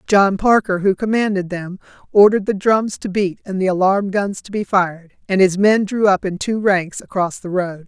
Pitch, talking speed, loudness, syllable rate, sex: 195 Hz, 215 wpm, -17 LUFS, 5.0 syllables/s, female